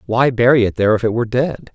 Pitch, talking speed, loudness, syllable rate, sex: 120 Hz, 275 wpm, -16 LUFS, 6.8 syllables/s, male